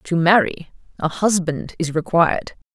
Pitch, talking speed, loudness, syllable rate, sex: 170 Hz, 130 wpm, -19 LUFS, 4.6 syllables/s, female